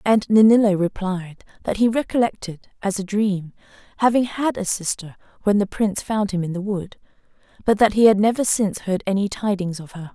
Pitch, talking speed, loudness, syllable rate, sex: 200 Hz, 190 wpm, -20 LUFS, 5.4 syllables/s, female